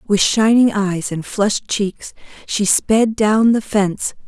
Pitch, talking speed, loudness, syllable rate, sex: 210 Hz, 155 wpm, -16 LUFS, 3.7 syllables/s, female